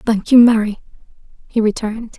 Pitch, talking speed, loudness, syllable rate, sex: 220 Hz, 135 wpm, -15 LUFS, 5.4 syllables/s, female